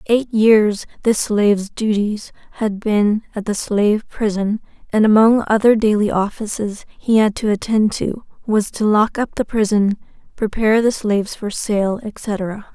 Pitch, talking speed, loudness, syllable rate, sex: 215 Hz, 155 wpm, -17 LUFS, 4.3 syllables/s, female